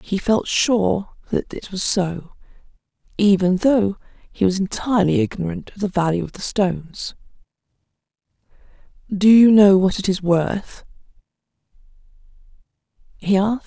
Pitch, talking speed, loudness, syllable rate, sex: 195 Hz, 125 wpm, -19 LUFS, 4.6 syllables/s, female